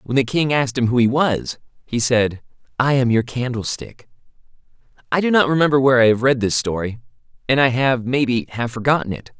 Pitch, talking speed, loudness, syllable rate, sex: 125 Hz, 200 wpm, -18 LUFS, 5.8 syllables/s, male